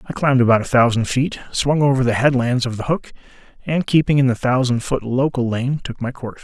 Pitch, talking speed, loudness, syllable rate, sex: 130 Hz, 225 wpm, -18 LUFS, 5.8 syllables/s, male